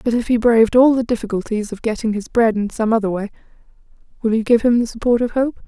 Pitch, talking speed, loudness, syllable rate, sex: 225 Hz, 235 wpm, -17 LUFS, 6.5 syllables/s, female